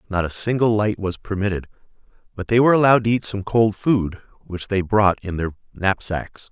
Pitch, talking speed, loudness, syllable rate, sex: 100 Hz, 195 wpm, -20 LUFS, 5.4 syllables/s, male